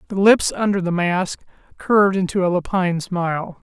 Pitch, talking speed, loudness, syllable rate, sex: 185 Hz, 160 wpm, -19 LUFS, 5.3 syllables/s, male